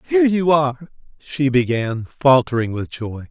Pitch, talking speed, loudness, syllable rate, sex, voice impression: 135 Hz, 145 wpm, -18 LUFS, 4.9 syllables/s, male, masculine, adult-like, clear, sincere, slightly friendly